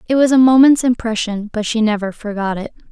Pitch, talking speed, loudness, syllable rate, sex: 230 Hz, 205 wpm, -15 LUFS, 5.9 syllables/s, female